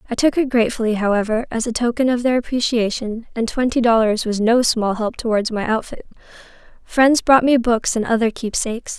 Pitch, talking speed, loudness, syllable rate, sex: 230 Hz, 185 wpm, -18 LUFS, 5.6 syllables/s, female